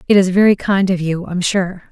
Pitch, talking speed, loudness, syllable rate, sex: 185 Hz, 250 wpm, -15 LUFS, 5.4 syllables/s, female